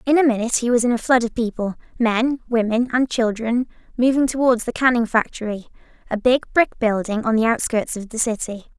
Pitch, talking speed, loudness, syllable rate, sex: 235 Hz, 200 wpm, -20 LUFS, 5.6 syllables/s, female